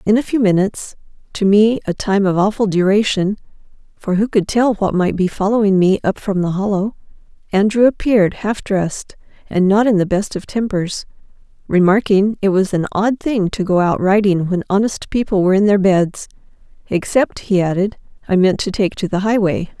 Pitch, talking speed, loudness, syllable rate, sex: 200 Hz, 180 wpm, -16 LUFS, 5.2 syllables/s, female